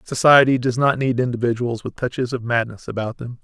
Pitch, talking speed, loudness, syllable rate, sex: 120 Hz, 190 wpm, -19 LUFS, 5.7 syllables/s, male